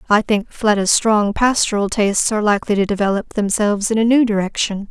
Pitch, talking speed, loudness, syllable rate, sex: 210 Hz, 185 wpm, -17 LUFS, 6.3 syllables/s, female